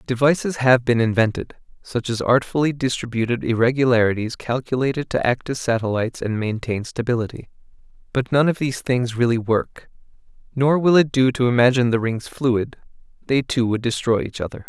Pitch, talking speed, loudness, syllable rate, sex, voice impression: 125 Hz, 160 wpm, -20 LUFS, 5.6 syllables/s, male, very masculine, very adult-like, thick, tensed, slightly powerful, bright, slightly hard, clear, fluent, cool, very intellectual, refreshing, sincere, calm, slightly mature, friendly, reassuring, unique, elegant, slightly wild, sweet, slightly lively, kind, slightly intense, slightly modest